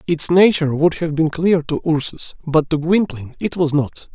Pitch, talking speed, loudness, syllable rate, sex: 160 Hz, 205 wpm, -17 LUFS, 5.1 syllables/s, male